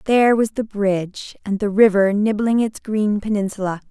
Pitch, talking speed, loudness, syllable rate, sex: 210 Hz, 170 wpm, -19 LUFS, 5.0 syllables/s, female